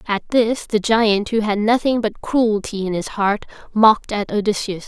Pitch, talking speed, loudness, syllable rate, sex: 215 Hz, 185 wpm, -18 LUFS, 4.5 syllables/s, female